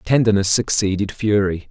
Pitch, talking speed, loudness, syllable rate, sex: 100 Hz, 105 wpm, -18 LUFS, 5.0 syllables/s, male